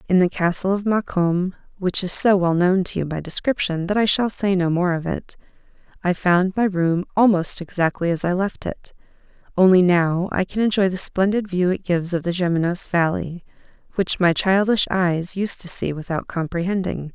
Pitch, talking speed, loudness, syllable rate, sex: 180 Hz, 195 wpm, -20 LUFS, 5.1 syllables/s, female